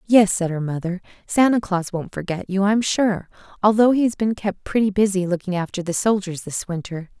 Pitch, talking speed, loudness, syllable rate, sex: 195 Hz, 210 wpm, -21 LUFS, 5.4 syllables/s, female